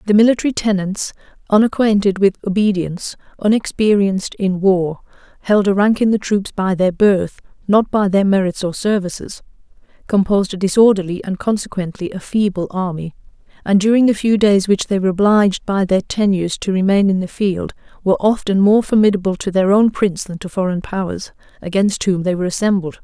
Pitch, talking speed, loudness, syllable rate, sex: 195 Hz, 170 wpm, -16 LUFS, 5.6 syllables/s, female